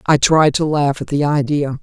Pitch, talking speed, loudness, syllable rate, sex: 145 Hz, 230 wpm, -16 LUFS, 4.7 syllables/s, female